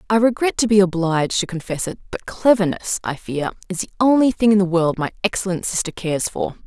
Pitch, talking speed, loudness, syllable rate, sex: 195 Hz, 215 wpm, -19 LUFS, 6.0 syllables/s, female